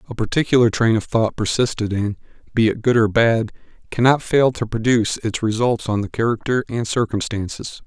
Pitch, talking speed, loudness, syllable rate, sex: 115 Hz, 175 wpm, -19 LUFS, 5.4 syllables/s, male